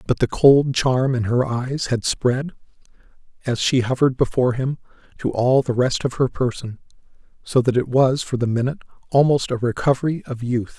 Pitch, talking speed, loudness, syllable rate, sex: 130 Hz, 185 wpm, -20 LUFS, 5.3 syllables/s, male